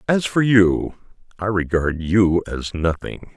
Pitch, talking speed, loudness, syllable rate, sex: 95 Hz, 145 wpm, -19 LUFS, 3.7 syllables/s, male